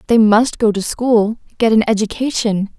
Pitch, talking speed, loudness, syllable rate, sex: 220 Hz, 150 wpm, -15 LUFS, 4.7 syllables/s, female